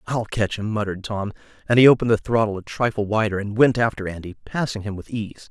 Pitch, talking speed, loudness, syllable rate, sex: 110 Hz, 230 wpm, -21 LUFS, 6.3 syllables/s, male